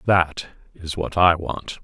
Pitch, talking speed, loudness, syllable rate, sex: 85 Hz, 165 wpm, -21 LUFS, 3.3 syllables/s, male